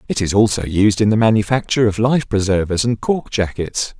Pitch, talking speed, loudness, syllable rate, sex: 105 Hz, 195 wpm, -17 LUFS, 5.5 syllables/s, male